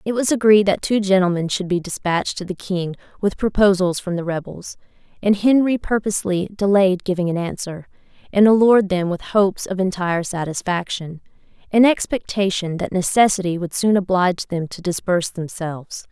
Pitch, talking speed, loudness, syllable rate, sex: 190 Hz, 160 wpm, -19 LUFS, 5.5 syllables/s, female